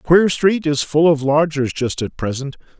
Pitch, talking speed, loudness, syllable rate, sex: 150 Hz, 195 wpm, -17 LUFS, 4.3 syllables/s, male